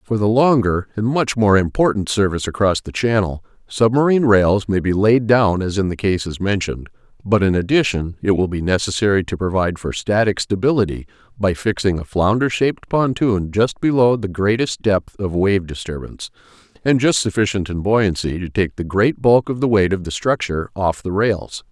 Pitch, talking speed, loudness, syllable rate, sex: 100 Hz, 185 wpm, -18 LUFS, 5.3 syllables/s, male